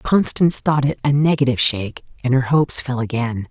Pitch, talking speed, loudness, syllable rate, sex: 130 Hz, 190 wpm, -18 LUFS, 5.9 syllables/s, female